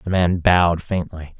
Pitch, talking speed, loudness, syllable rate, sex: 85 Hz, 170 wpm, -18 LUFS, 4.8 syllables/s, male